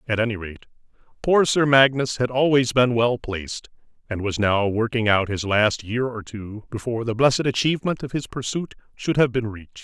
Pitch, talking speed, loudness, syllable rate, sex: 120 Hz, 195 wpm, -21 LUFS, 5.3 syllables/s, male